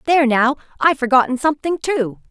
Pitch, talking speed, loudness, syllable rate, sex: 275 Hz, 155 wpm, -17 LUFS, 6.5 syllables/s, female